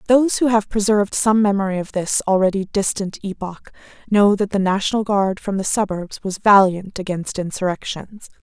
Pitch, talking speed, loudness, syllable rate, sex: 200 Hz, 160 wpm, -19 LUFS, 5.2 syllables/s, female